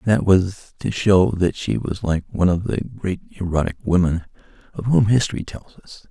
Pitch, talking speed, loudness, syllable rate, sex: 95 Hz, 185 wpm, -20 LUFS, 4.7 syllables/s, male